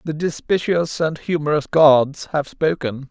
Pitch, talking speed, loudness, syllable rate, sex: 155 Hz, 135 wpm, -19 LUFS, 4.0 syllables/s, male